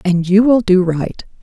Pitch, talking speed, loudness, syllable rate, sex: 195 Hz, 210 wpm, -13 LUFS, 4.2 syllables/s, female